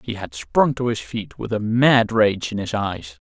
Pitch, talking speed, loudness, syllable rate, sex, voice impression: 110 Hz, 240 wpm, -20 LUFS, 4.2 syllables/s, male, very masculine, slightly old, thick, wild, slightly kind